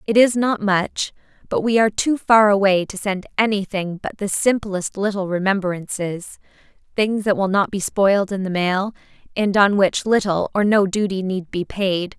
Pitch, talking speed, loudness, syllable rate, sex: 200 Hz, 180 wpm, -19 LUFS, 4.7 syllables/s, female